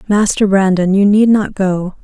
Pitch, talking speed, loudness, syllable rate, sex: 195 Hz, 175 wpm, -12 LUFS, 4.3 syllables/s, female